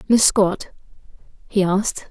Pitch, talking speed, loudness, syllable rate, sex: 200 Hz, 115 wpm, -18 LUFS, 4.3 syllables/s, female